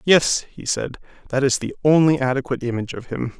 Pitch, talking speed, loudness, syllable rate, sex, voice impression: 135 Hz, 195 wpm, -20 LUFS, 6.1 syllables/s, male, masculine, adult-like, slightly thin, tensed, powerful, bright, clear, fluent, cool, intellectual, slightly refreshing, calm, friendly, reassuring, slightly wild, lively, slightly strict